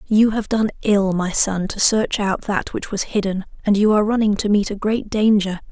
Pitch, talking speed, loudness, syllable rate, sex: 205 Hz, 230 wpm, -19 LUFS, 5.0 syllables/s, female